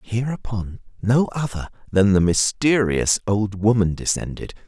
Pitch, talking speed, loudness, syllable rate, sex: 105 Hz, 115 wpm, -20 LUFS, 4.3 syllables/s, male